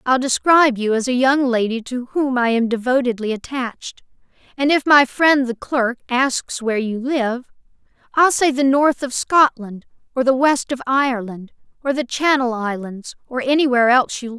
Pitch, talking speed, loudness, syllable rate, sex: 255 Hz, 180 wpm, -18 LUFS, 4.9 syllables/s, female